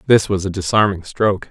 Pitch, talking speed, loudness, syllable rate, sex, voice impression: 95 Hz, 200 wpm, -17 LUFS, 6.0 syllables/s, male, masculine, adult-like, thick, tensed, powerful, slightly hard, clear, fluent, cool, intellectual, slightly friendly, reassuring, wild, lively